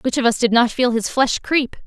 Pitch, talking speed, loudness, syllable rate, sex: 245 Hz, 290 wpm, -18 LUFS, 5.1 syllables/s, female